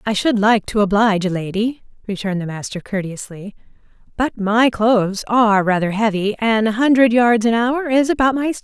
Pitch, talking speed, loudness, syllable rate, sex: 220 Hz, 190 wpm, -17 LUFS, 5.4 syllables/s, female